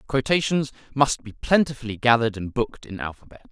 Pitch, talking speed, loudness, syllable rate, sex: 125 Hz, 155 wpm, -23 LUFS, 6.1 syllables/s, male